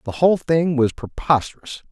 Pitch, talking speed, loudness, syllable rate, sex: 145 Hz, 155 wpm, -19 LUFS, 5.2 syllables/s, male